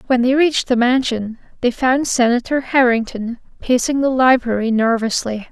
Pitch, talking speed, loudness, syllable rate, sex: 245 Hz, 140 wpm, -16 LUFS, 4.9 syllables/s, female